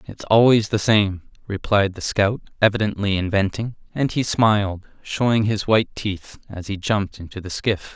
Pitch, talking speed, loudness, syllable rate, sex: 100 Hz, 165 wpm, -20 LUFS, 4.8 syllables/s, male